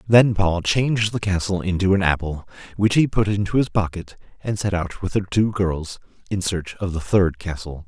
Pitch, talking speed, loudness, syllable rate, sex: 95 Hz, 205 wpm, -21 LUFS, 5.1 syllables/s, male